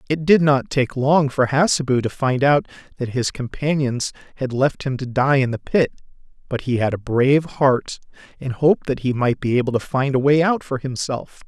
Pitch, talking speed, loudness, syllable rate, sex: 135 Hz, 215 wpm, -20 LUFS, 5.1 syllables/s, male